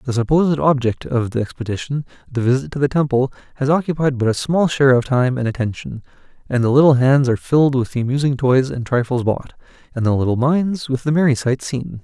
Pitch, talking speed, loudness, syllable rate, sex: 130 Hz, 215 wpm, -18 LUFS, 6.1 syllables/s, male